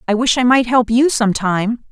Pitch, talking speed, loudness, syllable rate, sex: 230 Hz, 250 wpm, -15 LUFS, 4.7 syllables/s, female